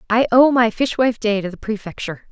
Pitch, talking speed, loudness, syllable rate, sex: 225 Hz, 210 wpm, -18 LUFS, 6.3 syllables/s, female